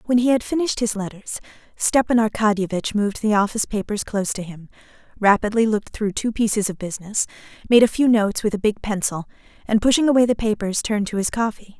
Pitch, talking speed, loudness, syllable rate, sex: 215 Hz, 200 wpm, -20 LUFS, 6.4 syllables/s, female